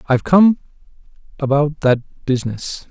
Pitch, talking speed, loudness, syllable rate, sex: 145 Hz, 85 wpm, -17 LUFS, 4.5 syllables/s, male